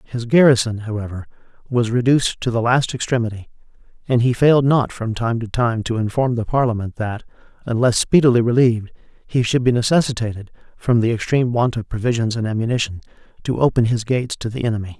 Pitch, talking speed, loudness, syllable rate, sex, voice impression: 120 Hz, 175 wpm, -19 LUFS, 6.2 syllables/s, male, very masculine, middle-aged, very thick, tensed, powerful, dark, slightly hard, muffled, fluent, raspy, cool, very intellectual, slightly refreshing, sincere, very calm, mature, very friendly, reassuring, unique, elegant, wild, sweet, lively, kind, modest